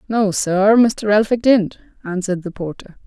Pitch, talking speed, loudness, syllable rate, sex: 205 Hz, 155 wpm, -16 LUFS, 4.7 syllables/s, female